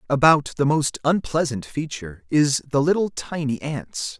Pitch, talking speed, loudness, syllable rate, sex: 140 Hz, 145 wpm, -22 LUFS, 4.5 syllables/s, male